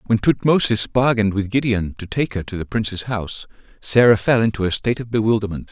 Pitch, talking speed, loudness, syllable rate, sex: 110 Hz, 200 wpm, -19 LUFS, 6.2 syllables/s, male